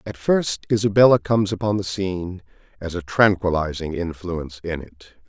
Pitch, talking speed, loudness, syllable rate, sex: 95 Hz, 150 wpm, -21 LUFS, 5.4 syllables/s, male